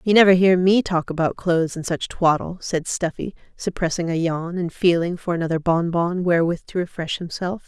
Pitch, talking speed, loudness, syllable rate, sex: 175 Hz, 195 wpm, -21 LUFS, 5.3 syllables/s, female